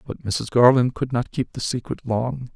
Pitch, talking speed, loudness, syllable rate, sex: 120 Hz, 210 wpm, -22 LUFS, 4.7 syllables/s, male